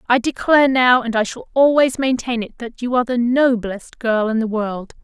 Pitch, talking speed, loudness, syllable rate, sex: 240 Hz, 215 wpm, -17 LUFS, 5.1 syllables/s, female